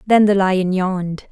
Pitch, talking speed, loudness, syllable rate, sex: 190 Hz, 185 wpm, -17 LUFS, 4.2 syllables/s, female